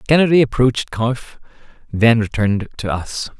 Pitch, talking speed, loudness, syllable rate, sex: 115 Hz, 125 wpm, -17 LUFS, 5.1 syllables/s, male